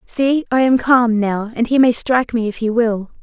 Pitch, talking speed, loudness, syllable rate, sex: 235 Hz, 240 wpm, -16 LUFS, 4.8 syllables/s, female